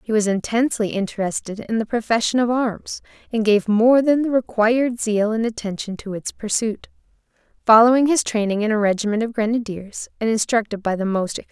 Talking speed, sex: 190 wpm, female